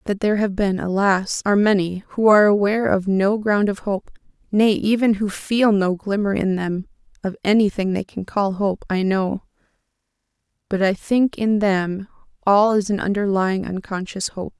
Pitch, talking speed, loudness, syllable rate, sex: 200 Hz, 175 wpm, -20 LUFS, 4.7 syllables/s, female